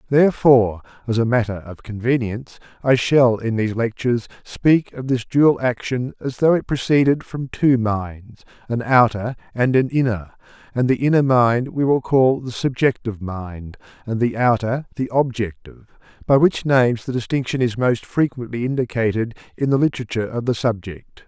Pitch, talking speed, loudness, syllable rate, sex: 120 Hz, 165 wpm, -19 LUFS, 5.1 syllables/s, male